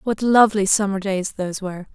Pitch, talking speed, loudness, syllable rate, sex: 200 Hz, 185 wpm, -19 LUFS, 5.9 syllables/s, female